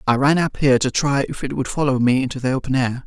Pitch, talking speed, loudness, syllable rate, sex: 135 Hz, 295 wpm, -19 LUFS, 6.5 syllables/s, male